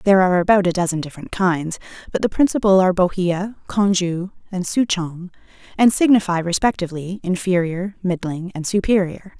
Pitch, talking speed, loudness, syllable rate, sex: 185 Hz, 140 wpm, -19 LUFS, 5.6 syllables/s, female